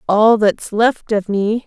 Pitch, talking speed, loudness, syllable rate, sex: 215 Hz, 180 wpm, -15 LUFS, 3.3 syllables/s, female